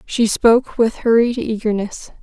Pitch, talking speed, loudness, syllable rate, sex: 225 Hz, 135 wpm, -16 LUFS, 4.4 syllables/s, female